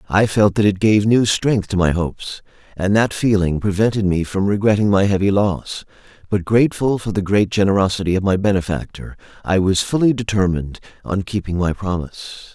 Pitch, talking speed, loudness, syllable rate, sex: 100 Hz, 175 wpm, -18 LUFS, 5.6 syllables/s, male